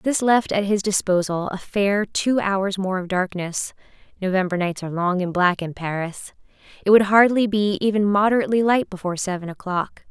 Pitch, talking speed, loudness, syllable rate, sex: 195 Hz, 180 wpm, -21 LUFS, 5.2 syllables/s, female